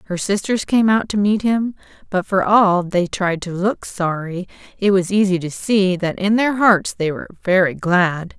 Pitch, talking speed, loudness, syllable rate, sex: 190 Hz, 200 wpm, -18 LUFS, 4.4 syllables/s, female